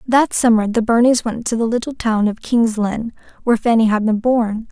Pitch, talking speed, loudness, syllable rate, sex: 230 Hz, 215 wpm, -17 LUFS, 5.1 syllables/s, female